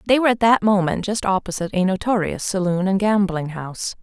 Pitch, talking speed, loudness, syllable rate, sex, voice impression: 195 Hz, 195 wpm, -20 LUFS, 6.1 syllables/s, female, very feminine, adult-like, thin, tensed, slightly powerful, bright, slightly soft, clear, fluent, slightly raspy, cute, slightly cool, intellectual, refreshing, sincere, calm, reassuring, unique, elegant, slightly wild, sweet, lively, slightly strict, slightly sharp, light